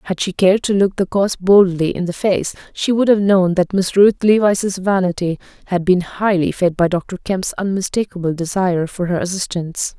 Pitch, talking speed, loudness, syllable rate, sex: 185 Hz, 190 wpm, -17 LUFS, 5.3 syllables/s, female